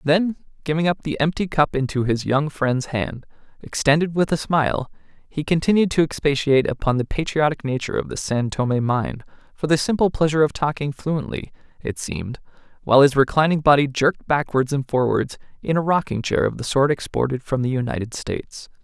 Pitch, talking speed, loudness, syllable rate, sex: 145 Hz, 180 wpm, -21 LUFS, 5.6 syllables/s, male